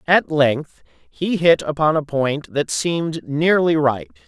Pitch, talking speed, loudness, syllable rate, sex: 150 Hz, 155 wpm, -19 LUFS, 3.6 syllables/s, male